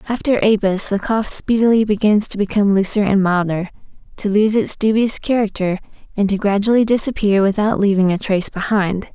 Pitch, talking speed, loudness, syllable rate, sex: 205 Hz, 165 wpm, -17 LUFS, 5.7 syllables/s, female